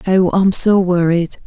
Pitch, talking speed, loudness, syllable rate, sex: 185 Hz, 165 wpm, -14 LUFS, 3.9 syllables/s, female